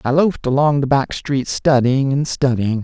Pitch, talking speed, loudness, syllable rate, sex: 135 Hz, 190 wpm, -17 LUFS, 4.8 syllables/s, male